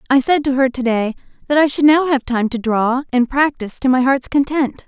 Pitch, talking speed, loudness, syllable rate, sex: 265 Hz, 235 wpm, -16 LUFS, 5.3 syllables/s, female